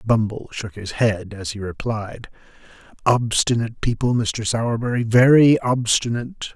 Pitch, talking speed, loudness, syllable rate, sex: 115 Hz, 120 wpm, -20 LUFS, 4.8 syllables/s, male